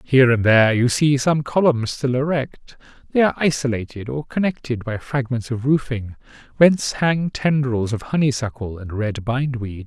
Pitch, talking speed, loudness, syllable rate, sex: 130 Hz, 165 wpm, -20 LUFS, 4.9 syllables/s, male